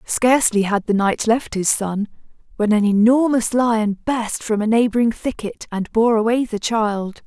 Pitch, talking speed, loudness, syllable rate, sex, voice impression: 225 Hz, 175 wpm, -18 LUFS, 4.4 syllables/s, female, very feminine, slightly young, slightly adult-like, thin, tensed, slightly powerful, slightly bright, hard, clear, very fluent, slightly raspy, cool, slightly intellectual, refreshing, slightly sincere, slightly calm, slightly friendly, slightly reassuring, unique, slightly elegant, wild, slightly sweet, slightly lively, intense, slightly sharp